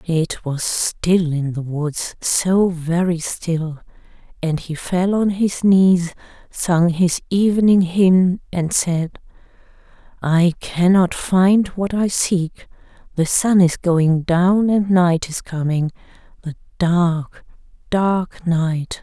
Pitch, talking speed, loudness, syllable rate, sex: 175 Hz, 125 wpm, -18 LUFS, 3.0 syllables/s, female